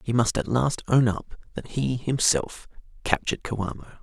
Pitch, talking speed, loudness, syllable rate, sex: 120 Hz, 165 wpm, -25 LUFS, 4.6 syllables/s, male